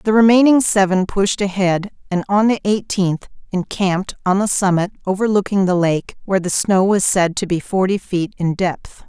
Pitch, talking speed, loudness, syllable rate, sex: 190 Hz, 180 wpm, -17 LUFS, 4.9 syllables/s, female